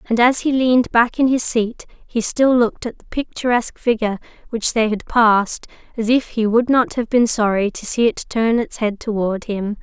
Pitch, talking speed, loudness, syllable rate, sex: 230 Hz, 215 wpm, -18 LUFS, 5.1 syllables/s, female